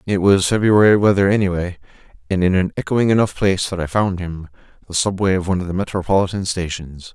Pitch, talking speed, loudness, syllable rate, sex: 95 Hz, 185 wpm, -18 LUFS, 6.2 syllables/s, male